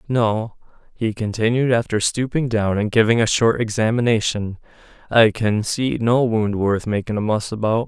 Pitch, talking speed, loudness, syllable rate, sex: 110 Hz, 160 wpm, -19 LUFS, 4.7 syllables/s, male